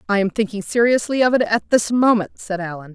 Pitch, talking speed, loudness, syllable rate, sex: 215 Hz, 225 wpm, -18 LUFS, 5.8 syllables/s, female